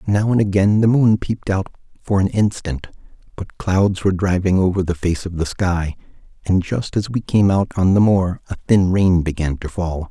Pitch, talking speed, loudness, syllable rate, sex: 95 Hz, 210 wpm, -18 LUFS, 5.0 syllables/s, male